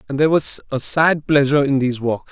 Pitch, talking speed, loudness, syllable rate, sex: 140 Hz, 235 wpm, -17 LUFS, 6.1 syllables/s, male